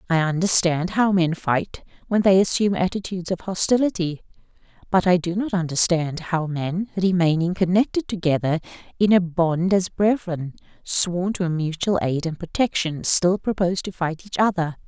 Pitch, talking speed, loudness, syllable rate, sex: 180 Hz, 155 wpm, -21 LUFS, 4.9 syllables/s, female